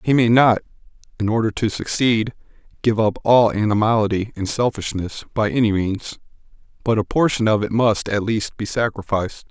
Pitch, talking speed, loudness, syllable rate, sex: 110 Hz, 165 wpm, -19 LUFS, 5.2 syllables/s, male